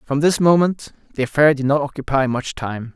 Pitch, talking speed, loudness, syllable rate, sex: 140 Hz, 205 wpm, -18 LUFS, 5.4 syllables/s, male